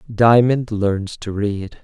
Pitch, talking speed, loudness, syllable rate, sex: 110 Hz, 130 wpm, -18 LUFS, 3.1 syllables/s, male